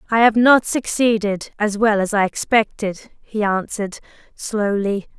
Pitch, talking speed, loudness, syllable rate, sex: 215 Hz, 140 wpm, -18 LUFS, 4.5 syllables/s, female